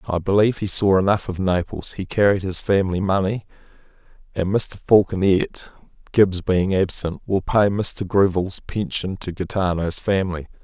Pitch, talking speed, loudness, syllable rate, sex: 95 Hz, 145 wpm, -20 LUFS, 4.8 syllables/s, male